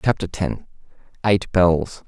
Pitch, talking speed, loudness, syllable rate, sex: 95 Hz, 115 wpm, -20 LUFS, 3.6 syllables/s, male